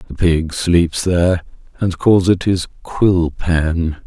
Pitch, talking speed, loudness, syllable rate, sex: 85 Hz, 145 wpm, -16 LUFS, 3.2 syllables/s, male